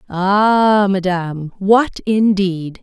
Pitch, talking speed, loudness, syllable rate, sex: 195 Hz, 85 wpm, -15 LUFS, 2.9 syllables/s, female